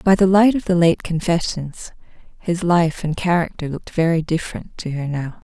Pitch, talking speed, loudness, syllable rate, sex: 170 Hz, 185 wpm, -19 LUFS, 5.1 syllables/s, female